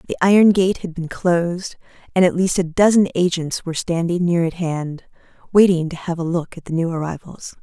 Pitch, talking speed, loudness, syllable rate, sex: 175 Hz, 205 wpm, -19 LUFS, 5.4 syllables/s, female